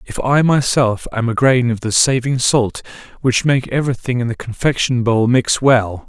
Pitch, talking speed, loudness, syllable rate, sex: 125 Hz, 190 wpm, -16 LUFS, 4.9 syllables/s, male